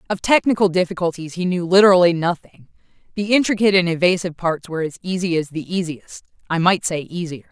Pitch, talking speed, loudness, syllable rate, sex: 175 Hz, 170 wpm, -18 LUFS, 6.3 syllables/s, female